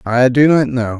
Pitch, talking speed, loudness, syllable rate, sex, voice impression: 125 Hz, 240 wpm, -13 LUFS, 4.6 syllables/s, male, masculine, slightly old, slightly powerful, slightly hard, muffled, halting, mature, wild, strict, slightly intense